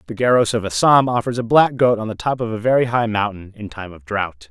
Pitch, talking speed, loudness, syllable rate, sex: 110 Hz, 265 wpm, -18 LUFS, 5.9 syllables/s, male